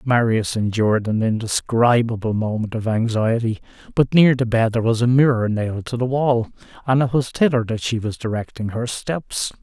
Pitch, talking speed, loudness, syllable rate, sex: 115 Hz, 180 wpm, -20 LUFS, 5.2 syllables/s, male